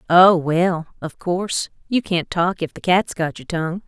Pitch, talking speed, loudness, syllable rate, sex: 175 Hz, 200 wpm, -20 LUFS, 4.5 syllables/s, female